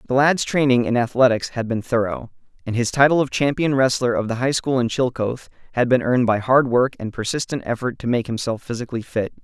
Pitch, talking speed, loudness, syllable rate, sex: 120 Hz, 215 wpm, -20 LUFS, 6.1 syllables/s, male